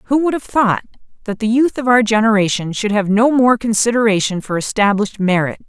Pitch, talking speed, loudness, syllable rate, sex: 220 Hz, 190 wpm, -15 LUFS, 5.7 syllables/s, female